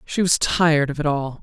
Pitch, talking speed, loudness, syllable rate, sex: 150 Hz, 255 wpm, -19 LUFS, 5.4 syllables/s, female